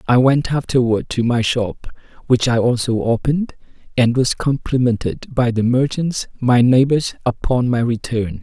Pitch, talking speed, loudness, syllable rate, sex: 125 Hz, 150 wpm, -17 LUFS, 4.5 syllables/s, male